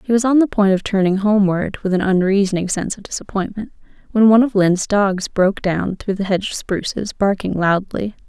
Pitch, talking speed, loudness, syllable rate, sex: 200 Hz, 205 wpm, -17 LUFS, 5.9 syllables/s, female